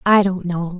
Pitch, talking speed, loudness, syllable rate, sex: 185 Hz, 225 wpm, -18 LUFS, 4.4 syllables/s, female